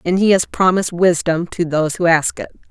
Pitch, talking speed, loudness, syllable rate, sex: 175 Hz, 220 wpm, -16 LUFS, 5.7 syllables/s, female